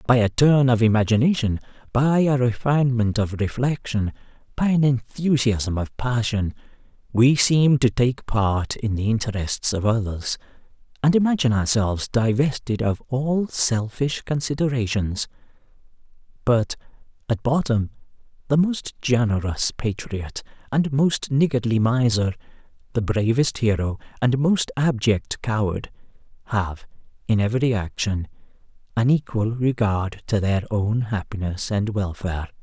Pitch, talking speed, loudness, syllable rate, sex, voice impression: 120 Hz, 120 wpm, -22 LUFS, 4.4 syllables/s, male, very masculine, adult-like, slightly soft, cool, slightly refreshing, sincere, calm, kind